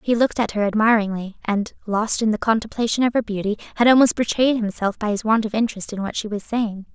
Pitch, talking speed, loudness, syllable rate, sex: 220 Hz, 235 wpm, -20 LUFS, 6.3 syllables/s, female